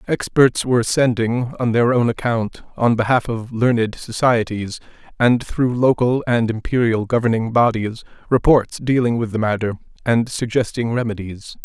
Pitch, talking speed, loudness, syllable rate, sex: 115 Hz, 130 wpm, -18 LUFS, 4.6 syllables/s, male